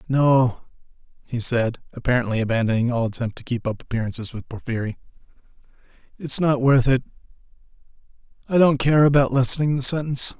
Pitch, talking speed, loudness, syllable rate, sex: 125 Hz, 140 wpm, -21 LUFS, 6.1 syllables/s, male